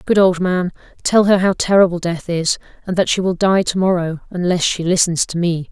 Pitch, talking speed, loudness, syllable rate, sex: 180 Hz, 220 wpm, -17 LUFS, 5.3 syllables/s, female